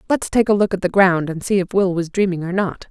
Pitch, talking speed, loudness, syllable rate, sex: 190 Hz, 310 wpm, -18 LUFS, 5.9 syllables/s, female